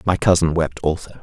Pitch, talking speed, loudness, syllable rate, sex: 85 Hz, 195 wpm, -19 LUFS, 5.6 syllables/s, male